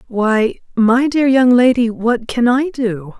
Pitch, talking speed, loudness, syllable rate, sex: 240 Hz, 170 wpm, -14 LUFS, 3.5 syllables/s, female